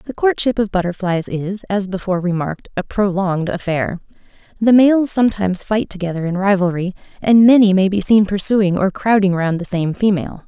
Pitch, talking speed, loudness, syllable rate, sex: 195 Hz, 170 wpm, -16 LUFS, 5.6 syllables/s, female